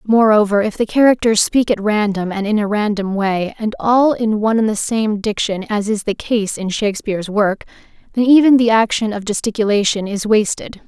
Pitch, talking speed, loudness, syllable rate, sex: 215 Hz, 195 wpm, -16 LUFS, 5.2 syllables/s, female